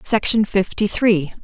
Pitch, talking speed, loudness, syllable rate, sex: 200 Hz, 125 wpm, -18 LUFS, 4.0 syllables/s, female